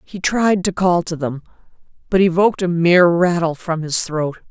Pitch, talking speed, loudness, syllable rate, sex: 175 Hz, 185 wpm, -17 LUFS, 4.9 syllables/s, female